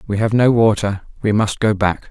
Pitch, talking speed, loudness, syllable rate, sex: 105 Hz, 230 wpm, -17 LUFS, 5.1 syllables/s, male